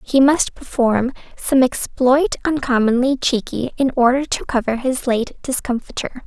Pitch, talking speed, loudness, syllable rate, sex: 255 Hz, 135 wpm, -18 LUFS, 4.6 syllables/s, female